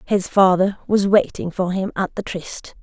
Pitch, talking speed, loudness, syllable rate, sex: 190 Hz, 190 wpm, -19 LUFS, 4.3 syllables/s, female